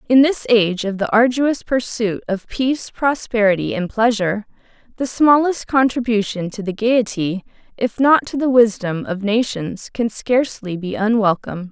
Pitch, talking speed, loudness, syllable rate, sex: 225 Hz, 150 wpm, -18 LUFS, 4.7 syllables/s, female